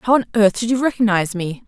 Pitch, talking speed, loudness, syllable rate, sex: 215 Hz, 250 wpm, -18 LUFS, 6.5 syllables/s, female